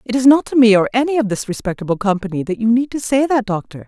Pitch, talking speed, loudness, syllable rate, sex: 230 Hz, 280 wpm, -16 LUFS, 6.7 syllables/s, female